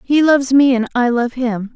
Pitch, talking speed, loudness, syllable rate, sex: 255 Hz, 240 wpm, -15 LUFS, 5.0 syllables/s, female